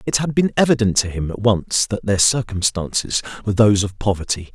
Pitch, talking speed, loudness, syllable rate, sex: 105 Hz, 200 wpm, -18 LUFS, 5.8 syllables/s, male